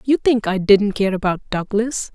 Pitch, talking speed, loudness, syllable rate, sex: 210 Hz, 195 wpm, -18 LUFS, 4.4 syllables/s, female